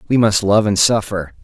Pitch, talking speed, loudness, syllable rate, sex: 105 Hz, 210 wpm, -15 LUFS, 4.9 syllables/s, male